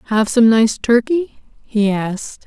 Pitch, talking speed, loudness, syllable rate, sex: 230 Hz, 145 wpm, -16 LUFS, 3.9 syllables/s, female